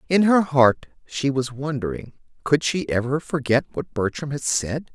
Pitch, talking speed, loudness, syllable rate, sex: 140 Hz, 170 wpm, -22 LUFS, 4.5 syllables/s, male